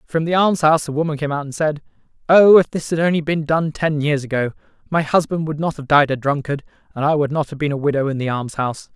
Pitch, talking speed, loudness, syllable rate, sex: 150 Hz, 260 wpm, -18 LUFS, 6.2 syllables/s, male